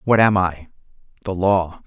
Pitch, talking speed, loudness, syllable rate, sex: 95 Hz, 130 wpm, -19 LUFS, 4.2 syllables/s, male